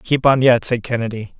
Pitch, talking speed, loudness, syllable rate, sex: 120 Hz, 215 wpm, -17 LUFS, 5.5 syllables/s, male